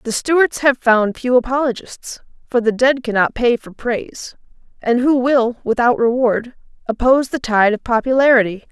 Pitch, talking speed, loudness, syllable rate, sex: 245 Hz, 160 wpm, -16 LUFS, 4.8 syllables/s, female